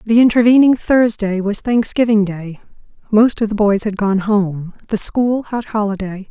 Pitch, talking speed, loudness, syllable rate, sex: 215 Hz, 160 wpm, -15 LUFS, 4.5 syllables/s, female